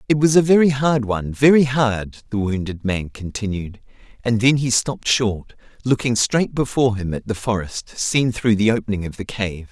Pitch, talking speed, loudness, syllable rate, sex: 115 Hz, 185 wpm, -19 LUFS, 5.0 syllables/s, male